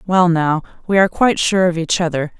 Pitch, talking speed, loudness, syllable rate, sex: 175 Hz, 225 wpm, -16 LUFS, 6.1 syllables/s, female